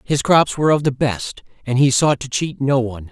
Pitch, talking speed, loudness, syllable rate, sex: 130 Hz, 250 wpm, -17 LUFS, 5.3 syllables/s, male